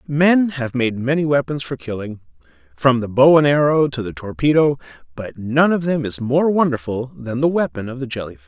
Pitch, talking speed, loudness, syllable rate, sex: 130 Hz, 205 wpm, -18 LUFS, 5.3 syllables/s, male